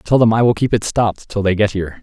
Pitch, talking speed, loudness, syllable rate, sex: 105 Hz, 325 wpm, -16 LUFS, 6.5 syllables/s, male